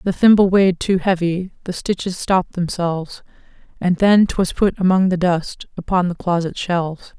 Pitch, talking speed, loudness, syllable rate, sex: 180 Hz, 175 wpm, -18 LUFS, 5.1 syllables/s, female